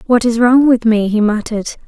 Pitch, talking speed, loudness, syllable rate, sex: 230 Hz, 225 wpm, -13 LUFS, 5.7 syllables/s, female